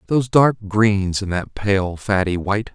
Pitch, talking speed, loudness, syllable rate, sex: 100 Hz, 175 wpm, -19 LUFS, 4.5 syllables/s, male